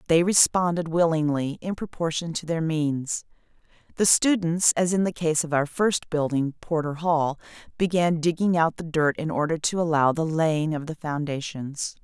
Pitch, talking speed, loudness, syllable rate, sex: 160 Hz, 170 wpm, -24 LUFS, 4.7 syllables/s, female